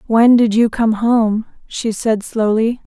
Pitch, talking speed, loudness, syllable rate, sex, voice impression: 225 Hz, 160 wpm, -15 LUFS, 3.6 syllables/s, female, feminine, slightly adult-like, slightly soft, friendly, slightly reassuring, kind